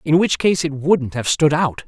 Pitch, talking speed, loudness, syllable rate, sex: 155 Hz, 255 wpm, -18 LUFS, 4.5 syllables/s, male